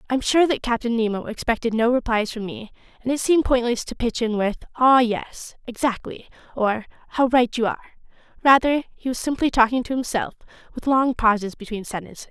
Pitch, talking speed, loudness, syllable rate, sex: 240 Hz, 185 wpm, -21 LUFS, 5.7 syllables/s, female